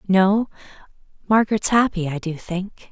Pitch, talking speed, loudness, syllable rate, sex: 195 Hz, 125 wpm, -20 LUFS, 4.6 syllables/s, female